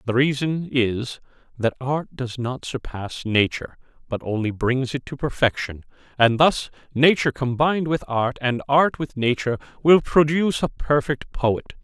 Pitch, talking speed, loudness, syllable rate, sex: 135 Hz, 150 wpm, -22 LUFS, 4.7 syllables/s, male